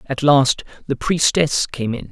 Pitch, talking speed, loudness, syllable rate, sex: 135 Hz, 170 wpm, -18 LUFS, 3.4 syllables/s, male